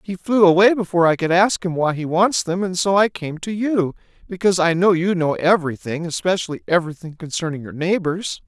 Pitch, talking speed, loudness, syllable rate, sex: 175 Hz, 205 wpm, -19 LUFS, 5.8 syllables/s, male